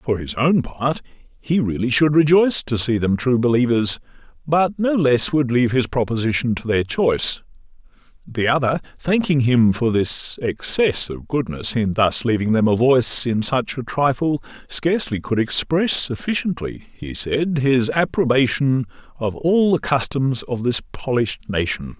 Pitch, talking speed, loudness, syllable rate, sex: 130 Hz, 160 wpm, -19 LUFS, 4.5 syllables/s, male